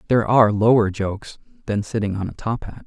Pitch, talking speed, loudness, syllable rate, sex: 110 Hz, 210 wpm, -20 LUFS, 6.3 syllables/s, male